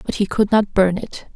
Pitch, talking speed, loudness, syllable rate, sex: 200 Hz, 265 wpm, -18 LUFS, 4.9 syllables/s, female